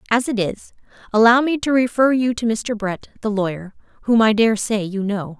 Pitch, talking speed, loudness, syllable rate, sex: 220 Hz, 210 wpm, -18 LUFS, 5.1 syllables/s, female